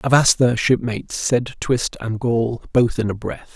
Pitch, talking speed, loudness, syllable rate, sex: 120 Hz, 185 wpm, -20 LUFS, 4.6 syllables/s, male